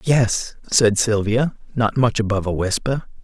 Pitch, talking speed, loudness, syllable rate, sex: 115 Hz, 150 wpm, -19 LUFS, 4.3 syllables/s, male